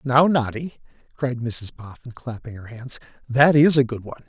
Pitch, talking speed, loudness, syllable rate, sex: 125 Hz, 180 wpm, -20 LUFS, 4.8 syllables/s, male